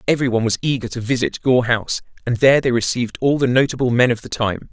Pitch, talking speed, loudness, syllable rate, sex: 125 Hz, 240 wpm, -18 LUFS, 7.0 syllables/s, male